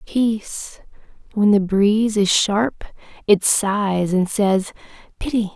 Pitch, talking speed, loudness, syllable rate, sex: 205 Hz, 120 wpm, -18 LUFS, 3.5 syllables/s, female